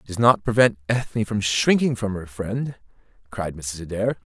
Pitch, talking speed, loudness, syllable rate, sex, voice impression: 105 Hz, 180 wpm, -22 LUFS, 4.7 syllables/s, male, very masculine, slightly young, very adult-like, middle-aged, thick, relaxed, slightly powerful, dark, soft, slightly muffled, halting, slightly raspy, cool, very intellectual, slightly refreshing, sincere, very calm, mature, friendly, reassuring, unique, elegant, slightly wild, sweet, slightly lively, slightly strict, modest